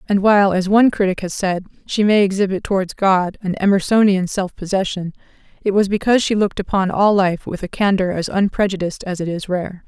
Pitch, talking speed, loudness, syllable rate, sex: 195 Hz, 200 wpm, -18 LUFS, 5.9 syllables/s, female